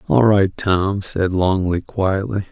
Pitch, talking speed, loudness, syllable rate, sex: 95 Hz, 145 wpm, -18 LUFS, 3.5 syllables/s, male